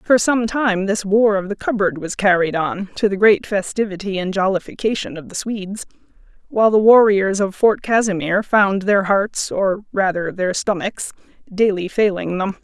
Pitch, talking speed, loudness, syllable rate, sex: 200 Hz, 170 wpm, -18 LUFS, 4.8 syllables/s, female